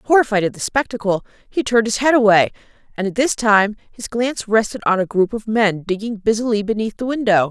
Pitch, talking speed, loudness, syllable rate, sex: 220 Hz, 200 wpm, -18 LUFS, 5.7 syllables/s, female